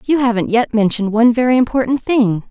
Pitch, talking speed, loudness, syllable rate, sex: 235 Hz, 190 wpm, -15 LUFS, 6.3 syllables/s, female